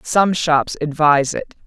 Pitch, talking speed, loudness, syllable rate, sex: 155 Hz, 145 wpm, -17 LUFS, 4.1 syllables/s, female